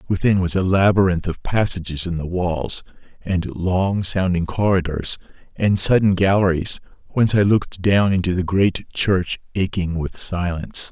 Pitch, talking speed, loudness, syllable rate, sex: 90 Hz, 150 wpm, -20 LUFS, 4.7 syllables/s, male